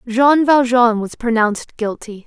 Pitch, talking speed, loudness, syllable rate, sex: 235 Hz, 130 wpm, -15 LUFS, 4.2 syllables/s, female